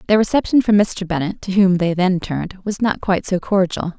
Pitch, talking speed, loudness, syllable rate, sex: 190 Hz, 225 wpm, -18 LUFS, 5.5 syllables/s, female